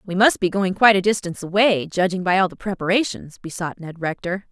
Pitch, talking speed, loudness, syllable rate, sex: 190 Hz, 215 wpm, -20 LUFS, 6.1 syllables/s, female